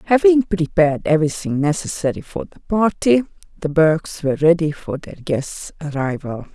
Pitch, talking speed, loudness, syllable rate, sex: 165 Hz, 135 wpm, -19 LUFS, 5.1 syllables/s, female